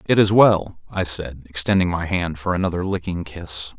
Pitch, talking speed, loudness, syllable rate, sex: 85 Hz, 190 wpm, -21 LUFS, 4.8 syllables/s, male